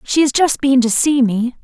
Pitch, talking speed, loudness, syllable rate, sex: 260 Hz, 255 wpm, -14 LUFS, 4.7 syllables/s, female